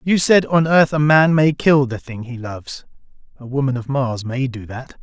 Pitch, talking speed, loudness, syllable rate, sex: 135 Hz, 225 wpm, -17 LUFS, 4.9 syllables/s, male